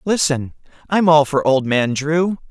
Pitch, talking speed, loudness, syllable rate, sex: 155 Hz, 170 wpm, -17 LUFS, 4.1 syllables/s, male